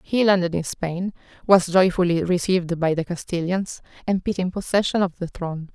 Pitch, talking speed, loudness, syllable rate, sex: 180 Hz, 175 wpm, -22 LUFS, 5.3 syllables/s, female